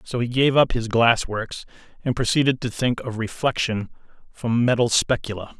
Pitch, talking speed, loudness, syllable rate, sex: 120 Hz, 170 wpm, -22 LUFS, 4.9 syllables/s, male